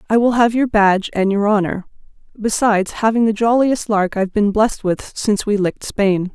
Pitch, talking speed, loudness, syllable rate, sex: 210 Hz, 200 wpm, -17 LUFS, 5.5 syllables/s, female